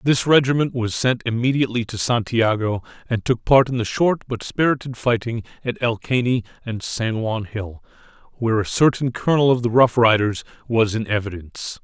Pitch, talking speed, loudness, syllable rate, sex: 120 Hz, 165 wpm, -20 LUFS, 5.4 syllables/s, male